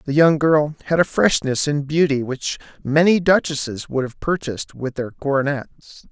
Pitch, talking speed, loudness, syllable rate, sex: 145 Hz, 155 wpm, -19 LUFS, 4.5 syllables/s, male